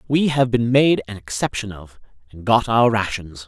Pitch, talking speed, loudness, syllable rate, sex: 110 Hz, 175 wpm, -19 LUFS, 4.8 syllables/s, male